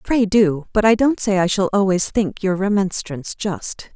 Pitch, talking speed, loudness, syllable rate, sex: 195 Hz, 195 wpm, -18 LUFS, 4.5 syllables/s, female